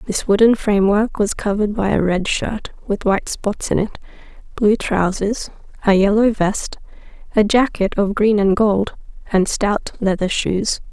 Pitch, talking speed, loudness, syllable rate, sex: 205 Hz, 150 wpm, -18 LUFS, 4.5 syllables/s, female